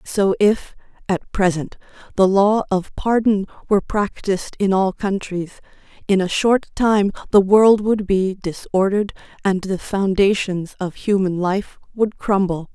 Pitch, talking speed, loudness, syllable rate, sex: 195 Hz, 140 wpm, -19 LUFS, 4.2 syllables/s, female